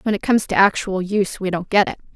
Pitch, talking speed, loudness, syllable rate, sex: 195 Hz, 280 wpm, -19 LUFS, 6.9 syllables/s, female